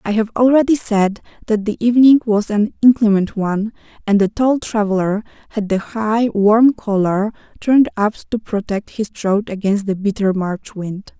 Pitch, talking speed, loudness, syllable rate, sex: 215 Hz, 165 wpm, -16 LUFS, 4.8 syllables/s, female